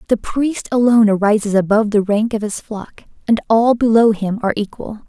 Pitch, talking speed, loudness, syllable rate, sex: 220 Hz, 190 wpm, -16 LUFS, 5.4 syllables/s, female